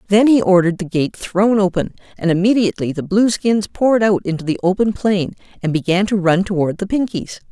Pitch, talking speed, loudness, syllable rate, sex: 195 Hz, 190 wpm, -17 LUFS, 5.8 syllables/s, female